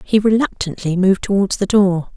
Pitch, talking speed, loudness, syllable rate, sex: 195 Hz, 165 wpm, -16 LUFS, 5.5 syllables/s, female